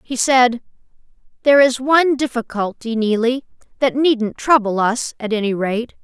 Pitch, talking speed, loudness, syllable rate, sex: 240 Hz, 140 wpm, -17 LUFS, 4.7 syllables/s, female